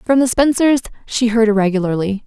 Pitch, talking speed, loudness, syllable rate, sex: 230 Hz, 160 wpm, -16 LUFS, 5.7 syllables/s, female